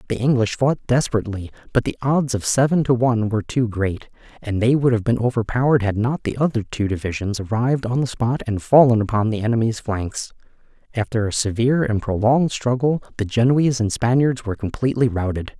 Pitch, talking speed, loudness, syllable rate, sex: 115 Hz, 190 wpm, -20 LUFS, 6.0 syllables/s, male